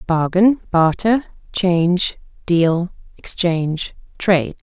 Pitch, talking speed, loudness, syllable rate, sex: 175 Hz, 75 wpm, -18 LUFS, 3.5 syllables/s, female